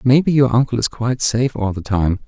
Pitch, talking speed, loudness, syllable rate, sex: 120 Hz, 235 wpm, -17 LUFS, 6.1 syllables/s, male